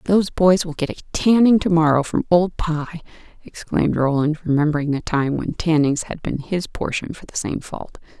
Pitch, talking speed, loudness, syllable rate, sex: 160 Hz, 190 wpm, -20 LUFS, 5.2 syllables/s, female